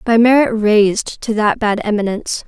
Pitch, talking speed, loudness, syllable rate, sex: 215 Hz, 170 wpm, -15 LUFS, 5.1 syllables/s, female